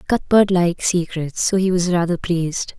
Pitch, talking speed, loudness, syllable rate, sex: 175 Hz, 170 wpm, -18 LUFS, 4.9 syllables/s, female